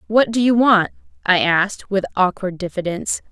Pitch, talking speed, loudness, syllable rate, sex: 195 Hz, 165 wpm, -18 LUFS, 5.3 syllables/s, female